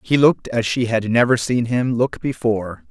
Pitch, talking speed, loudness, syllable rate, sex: 115 Hz, 205 wpm, -19 LUFS, 5.1 syllables/s, male